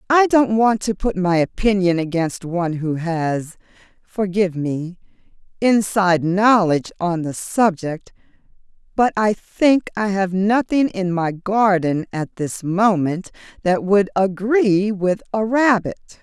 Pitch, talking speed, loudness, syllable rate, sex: 190 Hz, 135 wpm, -19 LUFS, 3.9 syllables/s, female